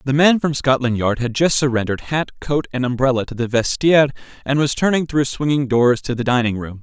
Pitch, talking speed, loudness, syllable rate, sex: 130 Hz, 220 wpm, -18 LUFS, 5.8 syllables/s, male